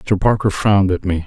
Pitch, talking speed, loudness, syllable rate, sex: 95 Hz, 240 wpm, -16 LUFS, 5.7 syllables/s, male